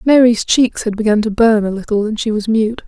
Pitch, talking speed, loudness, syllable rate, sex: 220 Hz, 250 wpm, -14 LUFS, 5.5 syllables/s, female